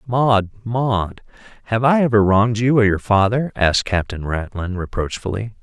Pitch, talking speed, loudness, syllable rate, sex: 110 Hz, 150 wpm, -18 LUFS, 4.7 syllables/s, male